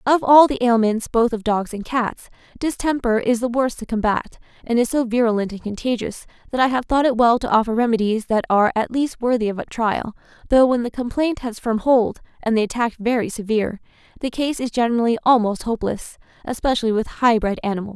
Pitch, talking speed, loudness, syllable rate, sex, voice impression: 235 Hz, 205 wpm, -20 LUFS, 5.8 syllables/s, female, feminine, adult-like, tensed, powerful, bright, clear, slightly cute, friendly, lively, slightly kind, slightly light